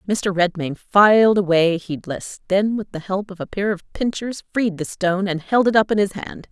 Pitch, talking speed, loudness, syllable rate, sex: 195 Hz, 220 wpm, -20 LUFS, 5.0 syllables/s, female